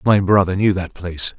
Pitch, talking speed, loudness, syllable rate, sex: 95 Hz, 215 wpm, -17 LUFS, 5.6 syllables/s, male